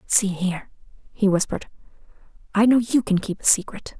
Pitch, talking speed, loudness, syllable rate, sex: 200 Hz, 165 wpm, -21 LUFS, 5.7 syllables/s, female